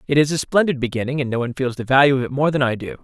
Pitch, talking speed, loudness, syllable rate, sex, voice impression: 135 Hz, 335 wpm, -19 LUFS, 7.7 syllables/s, male, masculine, adult-like, fluent, slightly refreshing, unique